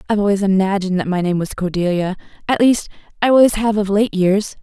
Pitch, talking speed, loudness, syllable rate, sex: 200 Hz, 195 wpm, -17 LUFS, 6.3 syllables/s, female